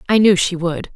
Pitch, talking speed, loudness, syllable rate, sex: 180 Hz, 250 wpm, -16 LUFS, 5.2 syllables/s, female